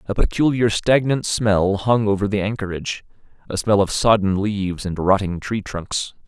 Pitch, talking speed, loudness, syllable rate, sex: 100 Hz, 155 wpm, -20 LUFS, 4.8 syllables/s, male